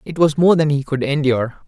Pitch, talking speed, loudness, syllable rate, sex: 145 Hz, 250 wpm, -17 LUFS, 6.1 syllables/s, male